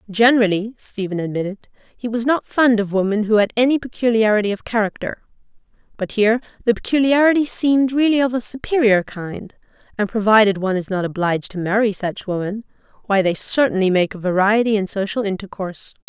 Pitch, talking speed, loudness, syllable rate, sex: 215 Hz, 165 wpm, -18 LUFS, 6.0 syllables/s, female